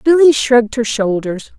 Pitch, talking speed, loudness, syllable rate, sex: 245 Hz, 150 wpm, -13 LUFS, 4.6 syllables/s, female